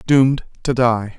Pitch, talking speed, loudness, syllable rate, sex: 125 Hz, 150 wpm, -17 LUFS, 4.4 syllables/s, male